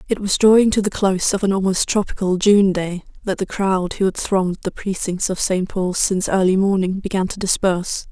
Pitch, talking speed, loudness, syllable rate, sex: 190 Hz, 215 wpm, -18 LUFS, 5.5 syllables/s, female